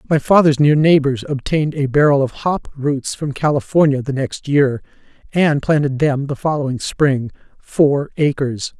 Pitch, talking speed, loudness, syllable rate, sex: 145 Hz, 150 wpm, -17 LUFS, 4.6 syllables/s, female